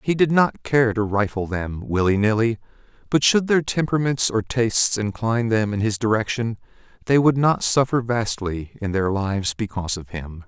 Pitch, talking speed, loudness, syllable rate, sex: 110 Hz, 180 wpm, -21 LUFS, 5.1 syllables/s, male